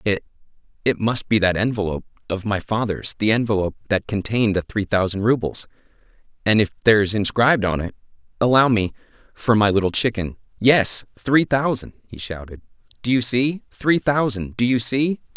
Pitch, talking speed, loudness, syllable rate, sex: 110 Hz, 160 wpm, -20 LUFS, 5.4 syllables/s, male